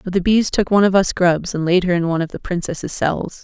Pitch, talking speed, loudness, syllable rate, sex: 180 Hz, 295 wpm, -18 LUFS, 6.3 syllables/s, female